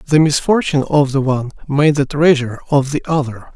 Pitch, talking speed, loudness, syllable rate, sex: 140 Hz, 185 wpm, -15 LUFS, 5.7 syllables/s, male